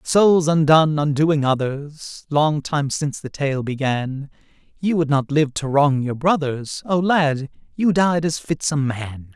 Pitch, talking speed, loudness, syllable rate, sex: 150 Hz, 165 wpm, -20 LUFS, 3.9 syllables/s, male